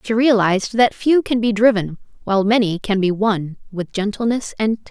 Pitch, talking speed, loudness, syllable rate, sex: 215 Hz, 195 wpm, -18 LUFS, 5.3 syllables/s, female